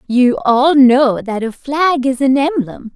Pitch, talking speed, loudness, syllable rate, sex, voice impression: 265 Hz, 185 wpm, -13 LUFS, 3.7 syllables/s, female, feminine, young, tensed, slightly powerful, bright, clear, fluent, cute, friendly, sweet, lively, slightly kind, slightly intense